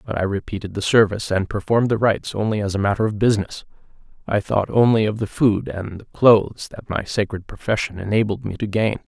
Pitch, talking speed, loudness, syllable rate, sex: 105 Hz, 205 wpm, -20 LUFS, 6.1 syllables/s, male